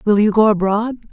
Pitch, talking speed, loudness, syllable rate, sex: 210 Hz, 215 wpm, -15 LUFS, 5.1 syllables/s, female